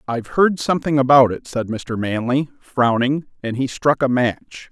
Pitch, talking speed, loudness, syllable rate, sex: 135 Hz, 180 wpm, -19 LUFS, 4.7 syllables/s, male